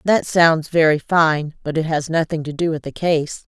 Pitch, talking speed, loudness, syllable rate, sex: 160 Hz, 220 wpm, -18 LUFS, 4.6 syllables/s, female